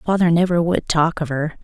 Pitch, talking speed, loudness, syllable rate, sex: 165 Hz, 220 wpm, -18 LUFS, 5.1 syllables/s, female